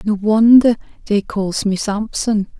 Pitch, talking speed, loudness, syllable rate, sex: 210 Hz, 140 wpm, -16 LUFS, 3.7 syllables/s, female